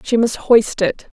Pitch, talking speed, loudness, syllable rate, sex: 225 Hz, 200 wpm, -16 LUFS, 3.9 syllables/s, female